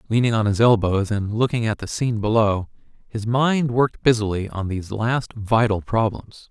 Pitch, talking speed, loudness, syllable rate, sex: 110 Hz, 175 wpm, -21 LUFS, 5.0 syllables/s, male